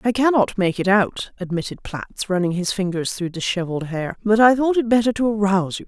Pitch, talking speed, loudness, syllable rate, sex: 200 Hz, 215 wpm, -20 LUFS, 5.6 syllables/s, female